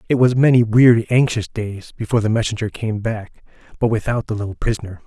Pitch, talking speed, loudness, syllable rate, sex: 110 Hz, 190 wpm, -18 LUFS, 6.1 syllables/s, male